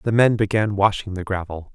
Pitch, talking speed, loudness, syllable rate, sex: 100 Hz, 205 wpm, -20 LUFS, 5.5 syllables/s, male